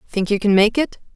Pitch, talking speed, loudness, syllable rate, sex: 210 Hz, 260 wpm, -18 LUFS, 5.8 syllables/s, female